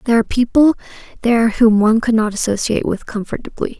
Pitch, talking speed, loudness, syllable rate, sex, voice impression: 225 Hz, 175 wpm, -16 LUFS, 7.0 syllables/s, female, feminine, slightly young, slightly soft, cute, calm, friendly, kind